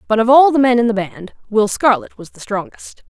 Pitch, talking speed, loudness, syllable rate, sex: 225 Hz, 250 wpm, -15 LUFS, 5.4 syllables/s, female